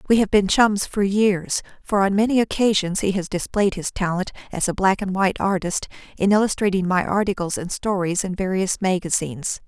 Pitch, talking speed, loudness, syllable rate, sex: 190 Hz, 185 wpm, -21 LUFS, 5.4 syllables/s, female